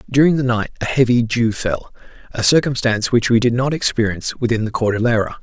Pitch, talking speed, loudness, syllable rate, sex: 120 Hz, 190 wpm, -17 LUFS, 6.1 syllables/s, male